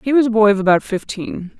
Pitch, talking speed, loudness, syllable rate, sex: 215 Hz, 265 wpm, -16 LUFS, 6.2 syllables/s, female